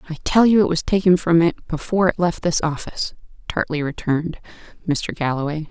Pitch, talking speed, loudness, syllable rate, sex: 165 Hz, 180 wpm, -20 LUFS, 5.7 syllables/s, female